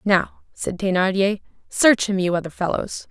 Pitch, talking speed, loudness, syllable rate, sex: 195 Hz, 155 wpm, -21 LUFS, 4.6 syllables/s, female